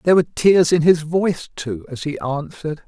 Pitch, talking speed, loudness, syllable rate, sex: 160 Hz, 210 wpm, -19 LUFS, 5.7 syllables/s, male